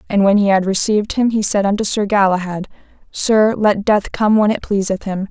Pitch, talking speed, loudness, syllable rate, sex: 205 Hz, 215 wpm, -16 LUFS, 5.4 syllables/s, female